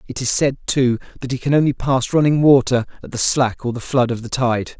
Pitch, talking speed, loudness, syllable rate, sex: 130 Hz, 250 wpm, -18 LUFS, 5.5 syllables/s, male